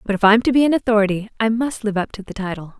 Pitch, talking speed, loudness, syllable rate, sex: 215 Hz, 300 wpm, -18 LUFS, 7.0 syllables/s, female